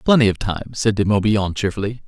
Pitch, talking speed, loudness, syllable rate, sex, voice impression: 105 Hz, 200 wpm, -19 LUFS, 6.3 syllables/s, male, masculine, adult-like, tensed, slightly powerful, fluent, refreshing, lively